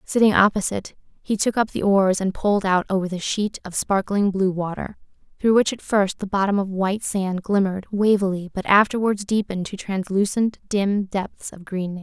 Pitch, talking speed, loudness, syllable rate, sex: 195 Hz, 185 wpm, -21 LUFS, 5.3 syllables/s, female